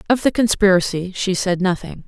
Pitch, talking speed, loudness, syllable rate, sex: 190 Hz, 175 wpm, -18 LUFS, 5.4 syllables/s, female